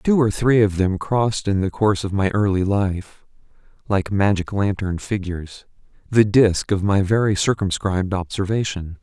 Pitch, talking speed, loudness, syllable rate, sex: 100 Hz, 160 wpm, -20 LUFS, 4.8 syllables/s, male